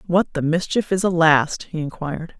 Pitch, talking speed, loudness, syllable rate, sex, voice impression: 165 Hz, 200 wpm, -20 LUFS, 4.9 syllables/s, female, very feminine, slightly young, slightly adult-like, slightly thin, tensed, powerful, bright, slightly soft, clear, fluent, slightly raspy, very cool, intellectual, very refreshing, slightly sincere, slightly calm, friendly, reassuring, unique, slightly elegant, very wild, slightly sweet, very lively, slightly strict, slightly intense